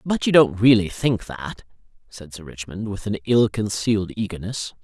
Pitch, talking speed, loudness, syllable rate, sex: 100 Hz, 175 wpm, -21 LUFS, 4.8 syllables/s, male